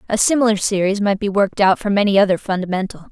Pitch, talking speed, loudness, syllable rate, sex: 200 Hz, 210 wpm, -17 LUFS, 6.9 syllables/s, female